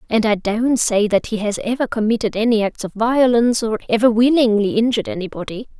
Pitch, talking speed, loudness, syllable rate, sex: 220 Hz, 185 wpm, -17 LUFS, 5.9 syllables/s, female